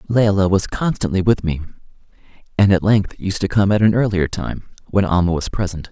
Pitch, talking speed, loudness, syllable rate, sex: 95 Hz, 195 wpm, -18 LUFS, 5.5 syllables/s, male